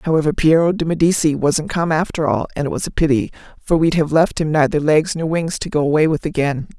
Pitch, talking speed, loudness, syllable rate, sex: 160 Hz, 240 wpm, -17 LUFS, 5.9 syllables/s, female